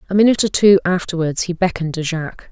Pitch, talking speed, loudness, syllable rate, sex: 180 Hz, 215 wpm, -17 LUFS, 7.1 syllables/s, female